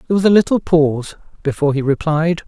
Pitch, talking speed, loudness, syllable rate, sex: 160 Hz, 195 wpm, -16 LUFS, 7.0 syllables/s, male